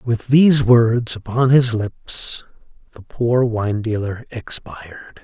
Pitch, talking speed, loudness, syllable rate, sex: 115 Hz, 125 wpm, -18 LUFS, 3.8 syllables/s, male